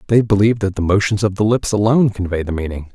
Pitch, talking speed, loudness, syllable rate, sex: 100 Hz, 245 wpm, -17 LUFS, 6.9 syllables/s, male